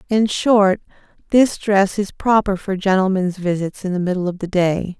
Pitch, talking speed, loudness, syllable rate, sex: 195 Hz, 180 wpm, -18 LUFS, 4.7 syllables/s, female